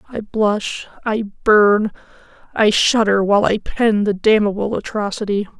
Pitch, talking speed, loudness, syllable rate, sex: 210 Hz, 130 wpm, -17 LUFS, 4.4 syllables/s, female